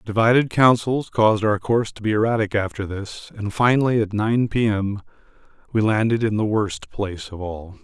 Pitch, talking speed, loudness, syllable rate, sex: 105 Hz, 185 wpm, -21 LUFS, 5.2 syllables/s, male